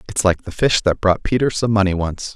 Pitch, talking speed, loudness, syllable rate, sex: 100 Hz, 255 wpm, -18 LUFS, 5.5 syllables/s, male